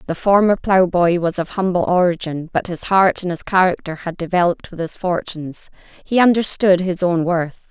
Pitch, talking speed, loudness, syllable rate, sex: 180 Hz, 180 wpm, -17 LUFS, 5.2 syllables/s, female